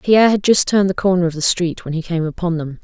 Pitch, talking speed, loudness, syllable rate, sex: 175 Hz, 295 wpm, -17 LUFS, 6.6 syllables/s, female